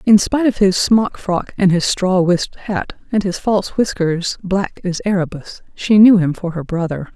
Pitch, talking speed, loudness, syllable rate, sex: 190 Hz, 200 wpm, -16 LUFS, 4.7 syllables/s, female